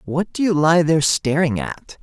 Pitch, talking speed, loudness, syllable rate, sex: 155 Hz, 205 wpm, -18 LUFS, 4.8 syllables/s, male